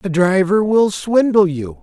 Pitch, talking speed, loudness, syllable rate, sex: 190 Hz, 165 wpm, -15 LUFS, 3.9 syllables/s, male